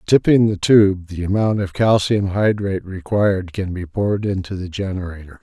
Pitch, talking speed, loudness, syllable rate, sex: 95 Hz, 175 wpm, -18 LUFS, 5.4 syllables/s, male